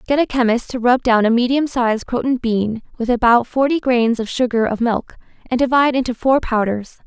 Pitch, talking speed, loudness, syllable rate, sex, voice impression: 240 Hz, 205 wpm, -17 LUFS, 5.4 syllables/s, female, feminine, adult-like, tensed, powerful, bright, clear, slightly cute, friendly, lively, slightly kind, slightly light